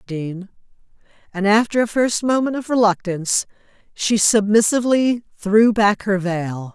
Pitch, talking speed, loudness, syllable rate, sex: 210 Hz, 125 wpm, -18 LUFS, 4.9 syllables/s, female